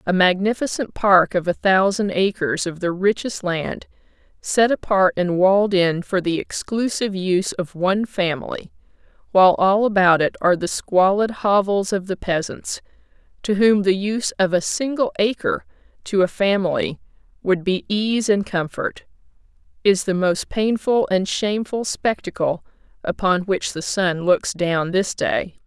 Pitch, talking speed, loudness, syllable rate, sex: 195 Hz, 150 wpm, -20 LUFS, 4.6 syllables/s, female